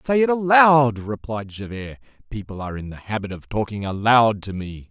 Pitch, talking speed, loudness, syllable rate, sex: 115 Hz, 185 wpm, -20 LUFS, 5.2 syllables/s, male